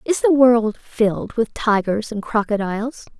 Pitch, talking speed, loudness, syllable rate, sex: 225 Hz, 150 wpm, -19 LUFS, 4.4 syllables/s, female